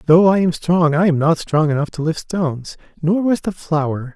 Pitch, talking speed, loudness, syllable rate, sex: 165 Hz, 230 wpm, -17 LUFS, 5.1 syllables/s, male